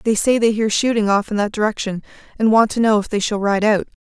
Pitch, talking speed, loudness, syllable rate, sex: 210 Hz, 270 wpm, -17 LUFS, 6.1 syllables/s, female